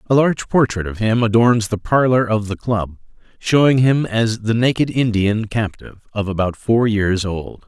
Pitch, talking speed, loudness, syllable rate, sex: 110 Hz, 180 wpm, -17 LUFS, 4.7 syllables/s, male